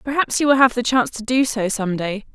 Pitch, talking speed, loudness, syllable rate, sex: 240 Hz, 280 wpm, -19 LUFS, 5.9 syllables/s, female